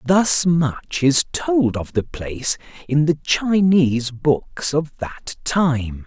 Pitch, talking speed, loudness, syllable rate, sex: 145 Hz, 140 wpm, -19 LUFS, 3.1 syllables/s, male